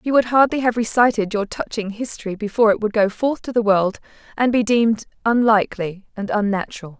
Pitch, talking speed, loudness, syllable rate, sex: 220 Hz, 190 wpm, -19 LUFS, 5.9 syllables/s, female